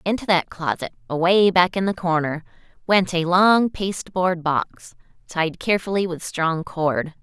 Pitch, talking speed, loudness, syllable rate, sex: 175 Hz, 150 wpm, -21 LUFS, 4.4 syllables/s, female